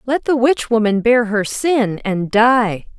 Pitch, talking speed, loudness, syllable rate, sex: 230 Hz, 180 wpm, -16 LUFS, 3.6 syllables/s, female